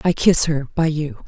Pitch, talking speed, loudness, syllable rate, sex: 155 Hz, 235 wpm, -18 LUFS, 4.6 syllables/s, female